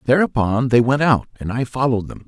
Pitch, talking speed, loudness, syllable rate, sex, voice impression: 125 Hz, 210 wpm, -18 LUFS, 5.9 syllables/s, male, masculine, very adult-like, very middle-aged, very thick, very tensed, powerful, bright, slightly hard, clear, slightly fluent, very cool, very intellectual, slightly refreshing, sincere, very calm, very mature, friendly, reassuring, very unique, very wild, sweet, lively, kind